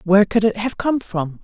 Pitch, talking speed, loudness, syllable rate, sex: 205 Hz, 250 wpm, -19 LUFS, 5.3 syllables/s, female